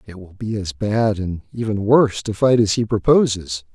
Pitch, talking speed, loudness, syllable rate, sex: 105 Hz, 210 wpm, -19 LUFS, 4.9 syllables/s, male